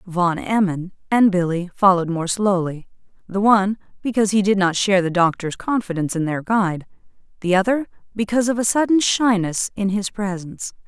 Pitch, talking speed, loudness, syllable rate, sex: 195 Hz, 165 wpm, -19 LUFS, 5.7 syllables/s, female